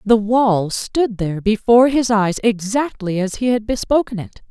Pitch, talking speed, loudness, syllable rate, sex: 220 Hz, 175 wpm, -17 LUFS, 4.6 syllables/s, female